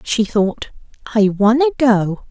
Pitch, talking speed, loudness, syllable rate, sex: 225 Hz, 130 wpm, -16 LUFS, 3.8 syllables/s, female